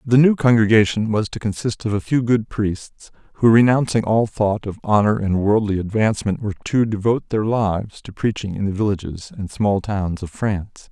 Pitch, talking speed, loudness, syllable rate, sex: 105 Hz, 190 wpm, -19 LUFS, 5.2 syllables/s, male